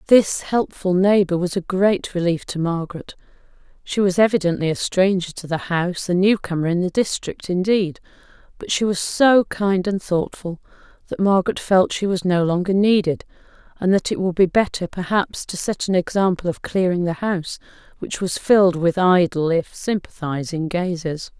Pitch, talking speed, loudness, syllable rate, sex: 185 Hz, 175 wpm, -20 LUFS, 5.0 syllables/s, female